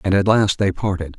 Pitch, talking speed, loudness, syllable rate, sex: 95 Hz, 255 wpm, -18 LUFS, 5.5 syllables/s, male